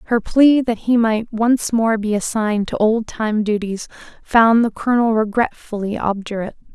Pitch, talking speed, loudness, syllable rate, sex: 220 Hz, 160 wpm, -18 LUFS, 4.8 syllables/s, female